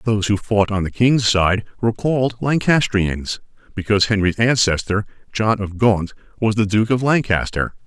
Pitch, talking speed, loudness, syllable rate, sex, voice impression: 110 Hz, 160 wpm, -18 LUFS, 5.0 syllables/s, male, very masculine, middle-aged, slightly thick, sincere, slightly mature, slightly wild